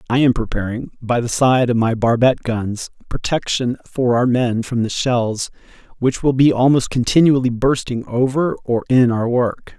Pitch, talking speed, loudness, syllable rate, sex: 125 Hz, 170 wpm, -17 LUFS, 4.6 syllables/s, male